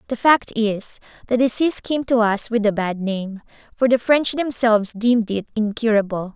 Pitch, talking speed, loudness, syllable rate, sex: 225 Hz, 180 wpm, -19 LUFS, 5.0 syllables/s, female